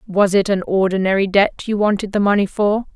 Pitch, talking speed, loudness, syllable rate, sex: 200 Hz, 205 wpm, -17 LUFS, 5.5 syllables/s, female